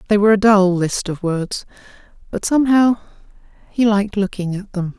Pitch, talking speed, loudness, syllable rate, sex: 200 Hz, 170 wpm, -17 LUFS, 5.5 syllables/s, female